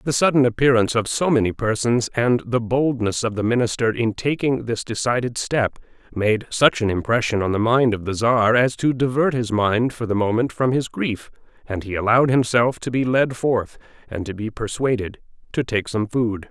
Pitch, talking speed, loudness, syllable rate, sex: 120 Hz, 200 wpm, -20 LUFS, 5.0 syllables/s, male